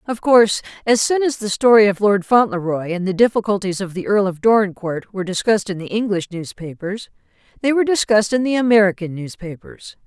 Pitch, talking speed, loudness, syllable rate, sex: 205 Hz, 185 wpm, -17 LUFS, 5.9 syllables/s, female